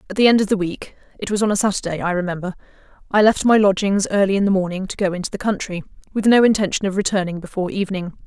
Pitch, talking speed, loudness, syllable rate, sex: 195 Hz, 225 wpm, -19 LUFS, 7.2 syllables/s, female